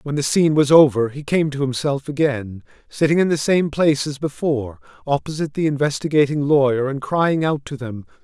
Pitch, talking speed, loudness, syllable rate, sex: 140 Hz, 190 wpm, -19 LUFS, 5.6 syllables/s, male